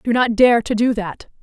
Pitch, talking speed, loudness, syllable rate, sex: 225 Hz, 250 wpm, -16 LUFS, 4.7 syllables/s, female